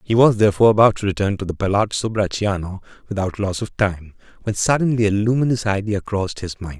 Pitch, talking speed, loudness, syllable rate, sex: 105 Hz, 195 wpm, -19 LUFS, 6.2 syllables/s, male